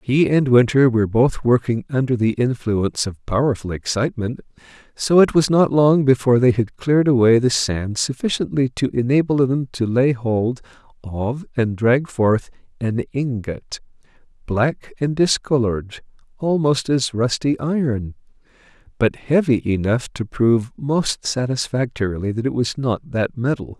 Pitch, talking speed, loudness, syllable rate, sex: 125 Hz, 145 wpm, -19 LUFS, 4.6 syllables/s, male